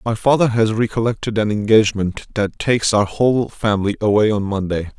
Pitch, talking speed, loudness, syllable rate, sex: 110 Hz, 170 wpm, -17 LUFS, 5.6 syllables/s, male